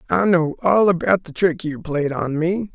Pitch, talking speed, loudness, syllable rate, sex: 170 Hz, 220 wpm, -19 LUFS, 4.4 syllables/s, male